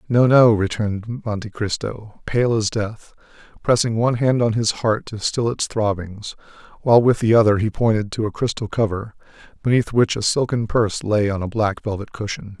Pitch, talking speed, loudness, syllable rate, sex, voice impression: 110 Hz, 185 wpm, -20 LUFS, 5.1 syllables/s, male, masculine, adult-like, slightly thick, slightly muffled, cool, sincere, friendly, kind